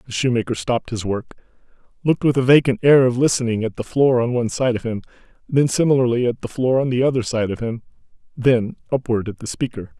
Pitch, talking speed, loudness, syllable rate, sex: 120 Hz, 215 wpm, -19 LUFS, 6.3 syllables/s, male